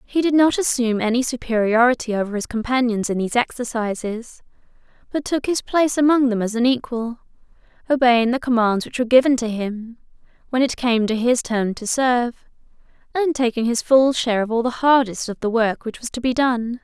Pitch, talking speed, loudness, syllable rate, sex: 240 Hz, 190 wpm, -20 LUFS, 5.6 syllables/s, female